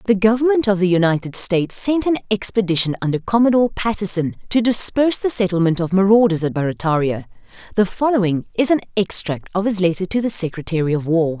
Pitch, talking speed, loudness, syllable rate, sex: 195 Hz, 175 wpm, -18 LUFS, 6.2 syllables/s, female